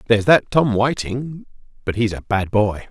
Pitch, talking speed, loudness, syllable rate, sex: 115 Hz, 185 wpm, -19 LUFS, 4.7 syllables/s, male